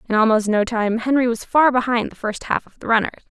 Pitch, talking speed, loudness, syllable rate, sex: 230 Hz, 250 wpm, -19 LUFS, 6.1 syllables/s, female